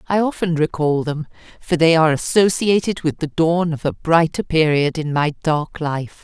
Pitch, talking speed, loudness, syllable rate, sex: 160 Hz, 185 wpm, -18 LUFS, 4.8 syllables/s, female